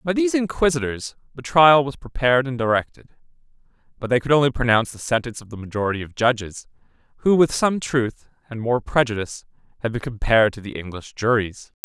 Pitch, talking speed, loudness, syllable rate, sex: 125 Hz, 175 wpm, -21 LUFS, 6.2 syllables/s, male